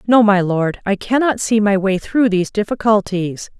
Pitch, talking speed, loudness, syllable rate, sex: 205 Hz, 185 wpm, -16 LUFS, 4.9 syllables/s, female